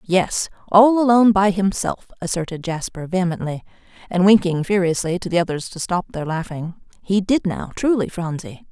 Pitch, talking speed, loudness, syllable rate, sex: 185 Hz, 160 wpm, -19 LUFS, 5.2 syllables/s, female